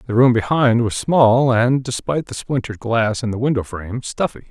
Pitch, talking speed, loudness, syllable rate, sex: 120 Hz, 200 wpm, -18 LUFS, 5.4 syllables/s, male